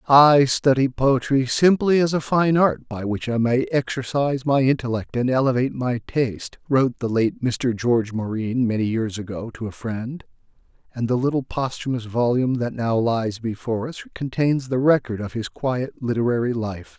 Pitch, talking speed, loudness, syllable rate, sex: 125 Hz, 175 wpm, -21 LUFS, 5.0 syllables/s, male